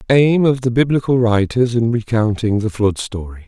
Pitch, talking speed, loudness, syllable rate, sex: 115 Hz, 175 wpm, -16 LUFS, 4.9 syllables/s, male